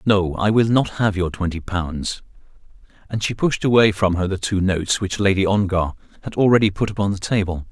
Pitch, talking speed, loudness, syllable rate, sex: 100 Hz, 200 wpm, -20 LUFS, 5.4 syllables/s, male